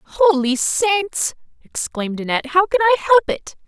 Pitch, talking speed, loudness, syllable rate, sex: 340 Hz, 145 wpm, -18 LUFS, 5.8 syllables/s, female